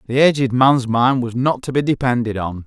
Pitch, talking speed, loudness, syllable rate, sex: 125 Hz, 225 wpm, -17 LUFS, 5.2 syllables/s, male